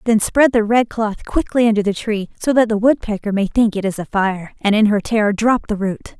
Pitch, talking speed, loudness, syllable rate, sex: 215 Hz, 250 wpm, -17 LUFS, 5.3 syllables/s, female